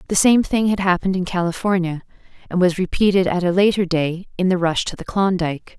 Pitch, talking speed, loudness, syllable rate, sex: 185 Hz, 205 wpm, -19 LUFS, 5.9 syllables/s, female